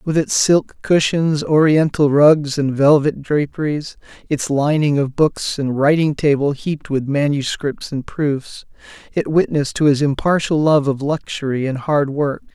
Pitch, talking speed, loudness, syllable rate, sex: 145 Hz, 155 wpm, -17 LUFS, 4.3 syllables/s, male